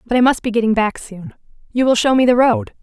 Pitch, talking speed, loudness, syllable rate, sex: 240 Hz, 275 wpm, -15 LUFS, 6.1 syllables/s, female